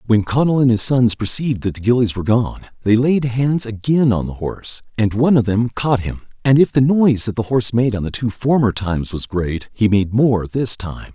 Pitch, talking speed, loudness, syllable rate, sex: 115 Hz, 235 wpm, -17 LUFS, 5.4 syllables/s, male